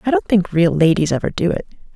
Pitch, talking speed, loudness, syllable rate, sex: 175 Hz, 245 wpm, -17 LUFS, 6.3 syllables/s, female